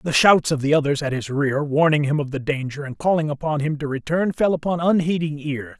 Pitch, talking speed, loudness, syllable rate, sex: 150 Hz, 240 wpm, -21 LUFS, 5.7 syllables/s, male